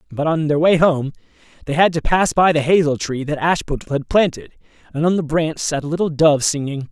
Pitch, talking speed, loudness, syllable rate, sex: 155 Hz, 225 wpm, -18 LUFS, 5.6 syllables/s, male